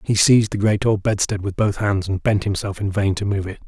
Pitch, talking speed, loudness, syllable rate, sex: 100 Hz, 280 wpm, -20 LUFS, 5.7 syllables/s, male